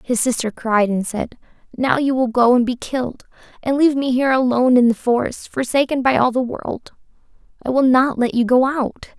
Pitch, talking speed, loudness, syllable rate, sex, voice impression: 250 Hz, 210 wpm, -18 LUFS, 5.6 syllables/s, female, very feminine, very young, very thin, tensed, slightly powerful, weak, very bright, hard, very clear, fluent, very cute, intellectual, very refreshing, sincere, calm, very friendly, very reassuring, elegant, very sweet, slightly lively, kind, slightly intense